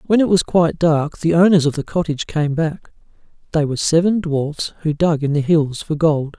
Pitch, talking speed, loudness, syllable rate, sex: 160 Hz, 215 wpm, -17 LUFS, 5.3 syllables/s, male